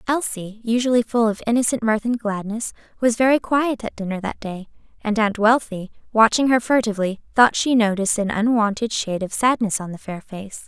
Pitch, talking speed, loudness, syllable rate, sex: 220 Hz, 185 wpm, -20 LUFS, 5.5 syllables/s, female